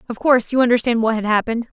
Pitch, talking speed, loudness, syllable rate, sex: 235 Hz, 235 wpm, -17 LUFS, 7.9 syllables/s, female